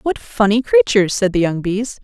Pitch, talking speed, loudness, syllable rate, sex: 200 Hz, 205 wpm, -16 LUFS, 5.2 syllables/s, female